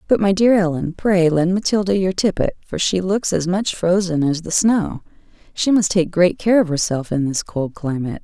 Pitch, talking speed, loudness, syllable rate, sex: 180 Hz, 210 wpm, -18 LUFS, 5.0 syllables/s, female